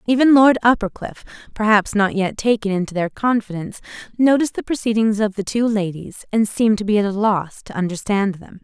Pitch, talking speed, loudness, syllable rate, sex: 210 Hz, 190 wpm, -18 LUFS, 4.5 syllables/s, female